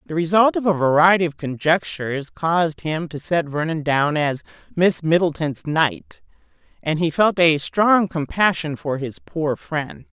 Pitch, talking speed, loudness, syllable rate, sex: 160 Hz, 160 wpm, -20 LUFS, 4.4 syllables/s, female